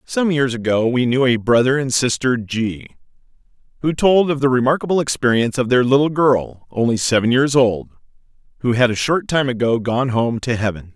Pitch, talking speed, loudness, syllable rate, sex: 125 Hz, 185 wpm, -17 LUFS, 5.3 syllables/s, male